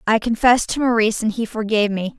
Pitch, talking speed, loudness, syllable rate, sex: 220 Hz, 220 wpm, -18 LUFS, 6.8 syllables/s, female